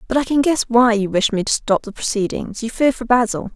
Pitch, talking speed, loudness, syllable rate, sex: 230 Hz, 255 wpm, -18 LUFS, 5.7 syllables/s, female